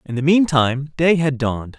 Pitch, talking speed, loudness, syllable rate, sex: 145 Hz, 200 wpm, -18 LUFS, 5.4 syllables/s, male